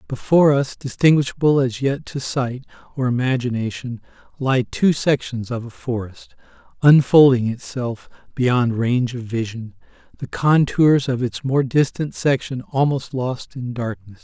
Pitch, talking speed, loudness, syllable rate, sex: 130 Hz, 135 wpm, -19 LUFS, 4.4 syllables/s, male